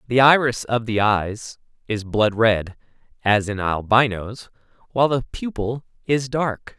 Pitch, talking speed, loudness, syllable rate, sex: 115 Hz, 140 wpm, -20 LUFS, 4.1 syllables/s, male